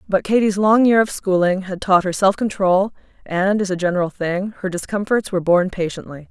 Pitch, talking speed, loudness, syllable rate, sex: 190 Hz, 200 wpm, -18 LUFS, 5.5 syllables/s, female